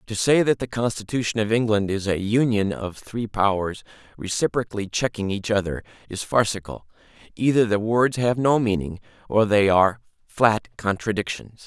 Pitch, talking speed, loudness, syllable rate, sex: 105 Hz, 155 wpm, -22 LUFS, 5.1 syllables/s, male